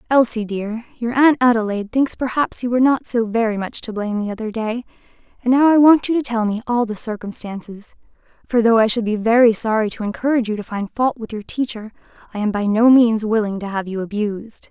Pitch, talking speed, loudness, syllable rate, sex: 225 Hz, 225 wpm, -18 LUFS, 5.9 syllables/s, female